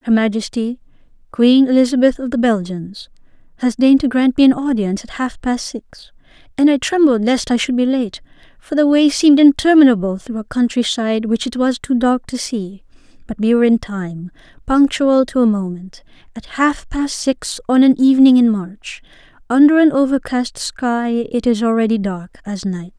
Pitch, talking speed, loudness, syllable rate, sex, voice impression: 240 Hz, 180 wpm, -15 LUFS, 5.1 syllables/s, female, slightly feminine, slightly adult-like, slightly calm, slightly elegant